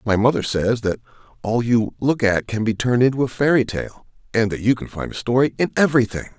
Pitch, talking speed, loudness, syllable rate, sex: 120 Hz, 225 wpm, -20 LUFS, 6.1 syllables/s, male